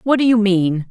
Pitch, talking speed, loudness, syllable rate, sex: 205 Hz, 265 wpm, -15 LUFS, 4.9 syllables/s, female